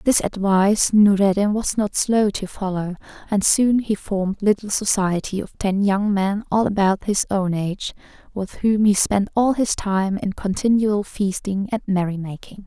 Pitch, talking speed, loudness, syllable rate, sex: 200 Hz, 170 wpm, -20 LUFS, 4.5 syllables/s, female